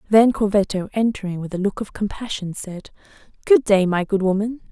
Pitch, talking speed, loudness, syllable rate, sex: 205 Hz, 180 wpm, -20 LUFS, 5.4 syllables/s, female